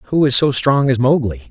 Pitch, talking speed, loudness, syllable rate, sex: 130 Hz, 240 wpm, -14 LUFS, 4.8 syllables/s, male